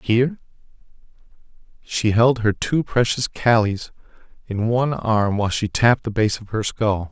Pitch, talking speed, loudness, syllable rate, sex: 110 Hz, 150 wpm, -20 LUFS, 4.7 syllables/s, male